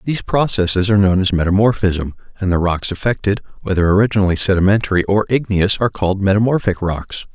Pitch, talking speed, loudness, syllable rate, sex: 100 Hz, 155 wpm, -16 LUFS, 6.5 syllables/s, male